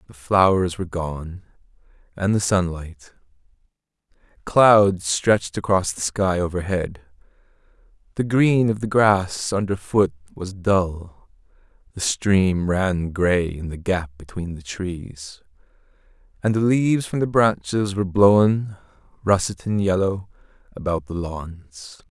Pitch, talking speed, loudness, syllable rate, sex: 95 Hz, 120 wpm, -21 LUFS, 3.8 syllables/s, male